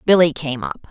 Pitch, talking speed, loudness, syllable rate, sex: 155 Hz, 200 wpm, -18 LUFS, 5.0 syllables/s, female